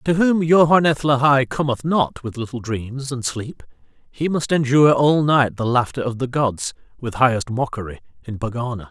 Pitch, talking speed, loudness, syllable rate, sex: 130 Hz, 175 wpm, -19 LUFS, 5.0 syllables/s, male